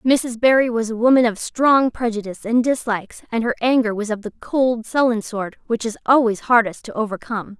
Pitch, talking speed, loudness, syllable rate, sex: 230 Hz, 195 wpm, -19 LUFS, 5.5 syllables/s, female